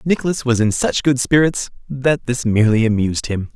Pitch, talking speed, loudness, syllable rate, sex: 125 Hz, 185 wpm, -17 LUFS, 5.6 syllables/s, male